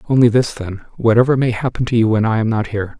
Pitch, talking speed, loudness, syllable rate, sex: 115 Hz, 260 wpm, -16 LUFS, 6.8 syllables/s, male